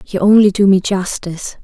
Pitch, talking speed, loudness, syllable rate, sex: 195 Hz, 185 wpm, -13 LUFS, 5.5 syllables/s, female